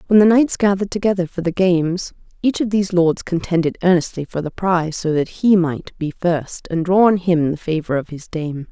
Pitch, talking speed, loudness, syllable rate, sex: 175 Hz, 220 wpm, -18 LUFS, 5.4 syllables/s, female